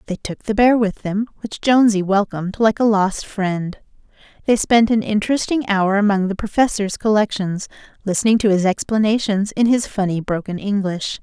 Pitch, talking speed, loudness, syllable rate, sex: 205 Hz, 165 wpm, -18 LUFS, 5.2 syllables/s, female